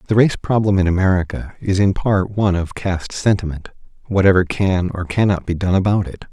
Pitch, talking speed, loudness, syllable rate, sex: 95 Hz, 190 wpm, -18 LUFS, 5.8 syllables/s, male